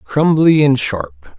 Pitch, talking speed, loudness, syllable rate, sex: 130 Hz, 130 wpm, -13 LUFS, 3.1 syllables/s, male